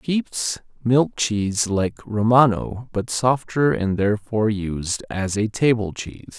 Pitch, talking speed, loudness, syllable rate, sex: 110 Hz, 130 wpm, -21 LUFS, 4.0 syllables/s, male